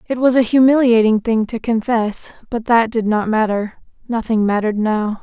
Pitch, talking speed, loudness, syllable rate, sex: 225 Hz, 160 wpm, -16 LUFS, 5.0 syllables/s, female